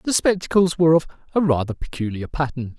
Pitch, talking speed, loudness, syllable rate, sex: 155 Hz, 170 wpm, -21 LUFS, 6.3 syllables/s, male